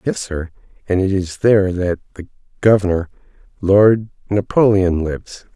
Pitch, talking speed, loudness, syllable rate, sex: 95 Hz, 140 wpm, -17 LUFS, 4.4 syllables/s, male